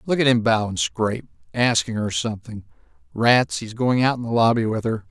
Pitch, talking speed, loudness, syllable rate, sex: 115 Hz, 190 wpm, -21 LUFS, 5.4 syllables/s, male